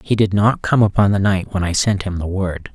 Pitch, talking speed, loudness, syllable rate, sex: 95 Hz, 285 wpm, -17 LUFS, 5.3 syllables/s, male